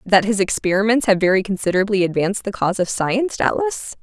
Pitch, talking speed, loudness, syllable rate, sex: 200 Hz, 180 wpm, -18 LUFS, 6.4 syllables/s, female